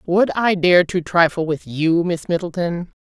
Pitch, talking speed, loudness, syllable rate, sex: 175 Hz, 180 wpm, -18 LUFS, 4.3 syllables/s, female